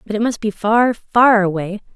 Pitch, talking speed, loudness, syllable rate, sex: 215 Hz, 215 wpm, -16 LUFS, 4.6 syllables/s, female